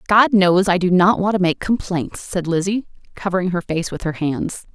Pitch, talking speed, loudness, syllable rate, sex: 185 Hz, 215 wpm, -18 LUFS, 5.0 syllables/s, female